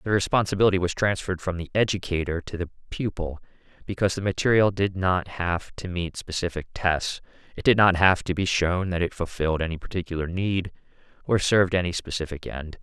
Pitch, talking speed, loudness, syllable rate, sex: 90 Hz, 180 wpm, -25 LUFS, 5.8 syllables/s, male